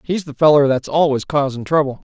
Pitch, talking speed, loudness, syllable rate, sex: 145 Hz, 200 wpm, -16 LUFS, 5.6 syllables/s, male